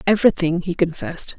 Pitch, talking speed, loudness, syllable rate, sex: 180 Hz, 130 wpm, -20 LUFS, 6.4 syllables/s, female